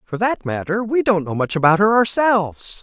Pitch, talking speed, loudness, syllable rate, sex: 190 Hz, 210 wpm, -18 LUFS, 5.1 syllables/s, male